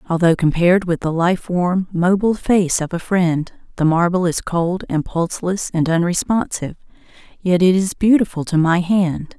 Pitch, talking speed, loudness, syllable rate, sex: 175 Hz, 165 wpm, -17 LUFS, 4.8 syllables/s, female